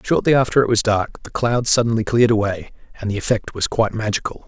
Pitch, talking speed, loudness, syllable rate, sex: 110 Hz, 215 wpm, -19 LUFS, 6.4 syllables/s, male